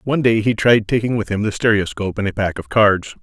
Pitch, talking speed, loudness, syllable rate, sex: 110 Hz, 260 wpm, -17 LUFS, 6.2 syllables/s, male